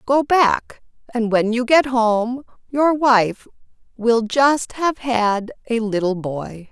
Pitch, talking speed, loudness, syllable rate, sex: 235 Hz, 145 wpm, -18 LUFS, 3.1 syllables/s, female